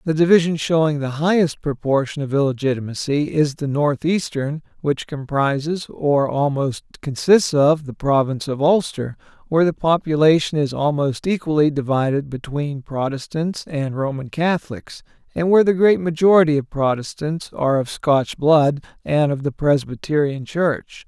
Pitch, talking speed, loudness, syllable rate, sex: 145 Hz, 140 wpm, -19 LUFS, 4.8 syllables/s, male